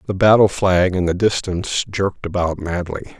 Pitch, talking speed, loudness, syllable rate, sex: 95 Hz, 170 wpm, -18 LUFS, 5.2 syllables/s, male